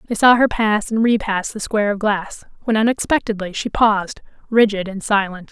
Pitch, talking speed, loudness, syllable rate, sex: 210 Hz, 185 wpm, -18 LUFS, 5.4 syllables/s, female